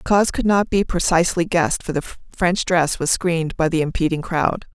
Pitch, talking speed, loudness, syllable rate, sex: 170 Hz, 215 wpm, -19 LUFS, 5.5 syllables/s, female